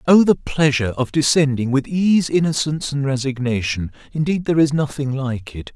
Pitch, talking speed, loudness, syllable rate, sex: 140 Hz, 155 wpm, -19 LUFS, 5.4 syllables/s, male